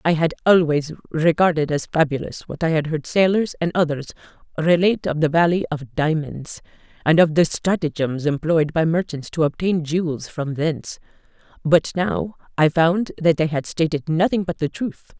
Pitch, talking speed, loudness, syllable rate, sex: 160 Hz, 170 wpm, -20 LUFS, 5.0 syllables/s, female